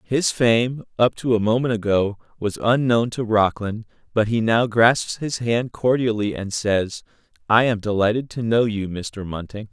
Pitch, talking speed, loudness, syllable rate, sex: 115 Hz, 165 wpm, -21 LUFS, 4.4 syllables/s, male